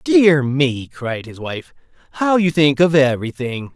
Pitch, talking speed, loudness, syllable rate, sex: 145 Hz, 160 wpm, -17 LUFS, 4.1 syllables/s, male